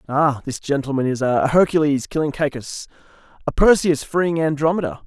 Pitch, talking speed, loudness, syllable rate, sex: 145 Hz, 140 wpm, -19 LUFS, 5.2 syllables/s, male